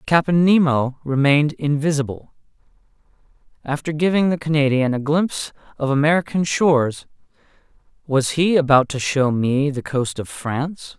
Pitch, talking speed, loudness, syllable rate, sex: 145 Hz, 125 wpm, -19 LUFS, 4.9 syllables/s, male